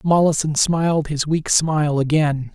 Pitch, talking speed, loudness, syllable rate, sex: 150 Hz, 140 wpm, -18 LUFS, 4.5 syllables/s, male